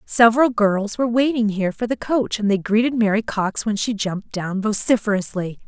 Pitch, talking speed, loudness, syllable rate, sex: 215 Hz, 190 wpm, -20 LUFS, 5.4 syllables/s, female